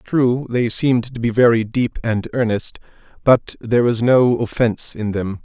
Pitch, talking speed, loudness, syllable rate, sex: 120 Hz, 175 wpm, -18 LUFS, 4.7 syllables/s, male